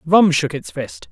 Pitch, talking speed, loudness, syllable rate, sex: 165 Hz, 215 wpm, -18 LUFS, 4.0 syllables/s, male